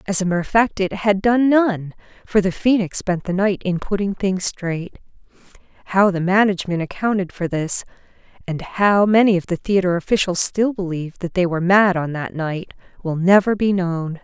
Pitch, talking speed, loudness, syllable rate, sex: 190 Hz, 190 wpm, -19 LUFS, 5.2 syllables/s, female